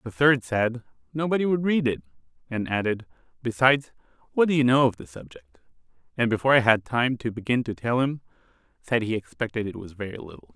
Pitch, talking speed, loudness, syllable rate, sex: 120 Hz, 195 wpm, -24 LUFS, 6.1 syllables/s, male